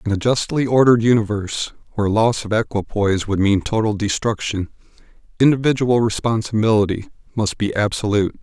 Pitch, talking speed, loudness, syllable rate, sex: 110 Hz, 130 wpm, -19 LUFS, 5.9 syllables/s, male